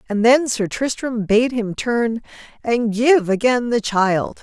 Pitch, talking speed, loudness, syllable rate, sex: 230 Hz, 165 wpm, -18 LUFS, 3.7 syllables/s, female